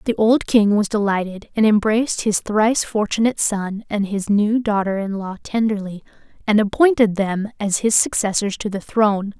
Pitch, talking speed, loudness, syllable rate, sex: 210 Hz, 170 wpm, -19 LUFS, 5.1 syllables/s, female